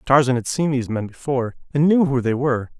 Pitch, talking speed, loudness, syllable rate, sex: 135 Hz, 235 wpm, -20 LUFS, 6.6 syllables/s, male